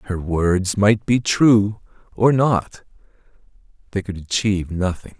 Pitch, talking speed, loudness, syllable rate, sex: 100 Hz, 125 wpm, -19 LUFS, 3.7 syllables/s, male